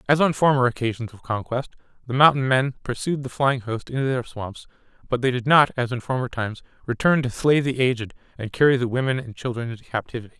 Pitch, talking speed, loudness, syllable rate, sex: 125 Hz, 215 wpm, -22 LUFS, 6.2 syllables/s, male